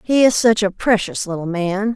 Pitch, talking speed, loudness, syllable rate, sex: 205 Hz, 215 wpm, -17 LUFS, 4.9 syllables/s, female